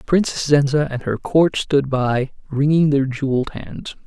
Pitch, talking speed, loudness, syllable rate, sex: 140 Hz, 160 wpm, -19 LUFS, 4.3 syllables/s, male